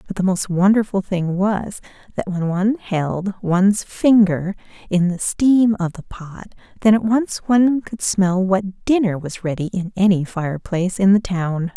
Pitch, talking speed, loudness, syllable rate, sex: 190 Hz, 180 wpm, -18 LUFS, 4.3 syllables/s, female